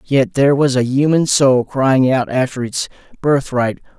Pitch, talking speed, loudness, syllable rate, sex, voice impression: 130 Hz, 165 wpm, -15 LUFS, 4.4 syllables/s, male, masculine, adult-like, tensed, powerful, slightly hard, slightly nasal, slightly intellectual, calm, friendly, wild, lively